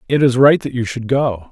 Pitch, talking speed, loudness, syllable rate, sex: 125 Hz, 275 wpm, -15 LUFS, 5.3 syllables/s, male